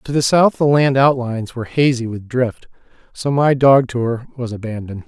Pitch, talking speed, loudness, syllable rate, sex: 125 Hz, 190 wpm, -17 LUFS, 5.2 syllables/s, male